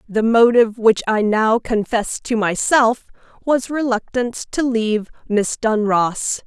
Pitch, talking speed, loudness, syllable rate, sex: 225 Hz, 130 wpm, -18 LUFS, 4.3 syllables/s, female